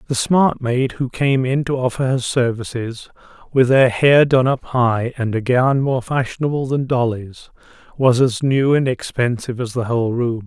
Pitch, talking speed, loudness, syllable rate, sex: 125 Hz, 185 wpm, -18 LUFS, 4.6 syllables/s, male